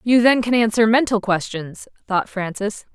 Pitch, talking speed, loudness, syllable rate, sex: 215 Hz, 165 wpm, -19 LUFS, 4.6 syllables/s, female